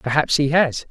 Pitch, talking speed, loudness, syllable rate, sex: 145 Hz, 200 wpm, -18 LUFS, 4.7 syllables/s, male